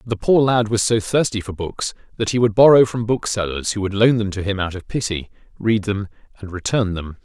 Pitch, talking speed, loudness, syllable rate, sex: 105 Hz, 230 wpm, -19 LUFS, 5.4 syllables/s, male